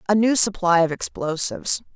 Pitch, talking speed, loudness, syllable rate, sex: 185 Hz, 155 wpm, -20 LUFS, 5.4 syllables/s, female